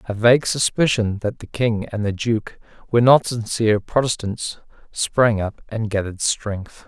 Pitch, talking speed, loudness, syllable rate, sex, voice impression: 110 Hz, 155 wpm, -20 LUFS, 4.6 syllables/s, male, masculine, adult-like, relaxed, weak, slightly dark, slightly raspy, cool, calm, slightly reassuring, kind, modest